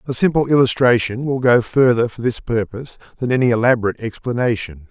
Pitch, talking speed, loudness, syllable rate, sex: 120 Hz, 160 wpm, -17 LUFS, 6.2 syllables/s, male